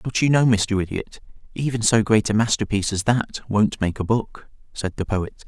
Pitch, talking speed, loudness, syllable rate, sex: 105 Hz, 210 wpm, -21 LUFS, 5.1 syllables/s, male